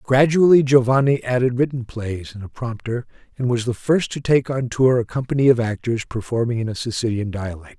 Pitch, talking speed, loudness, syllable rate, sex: 120 Hz, 195 wpm, -20 LUFS, 5.5 syllables/s, male